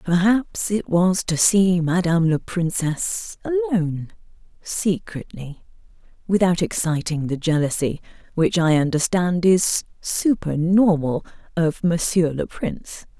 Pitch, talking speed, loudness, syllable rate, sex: 175 Hz, 95 wpm, -20 LUFS, 4.1 syllables/s, female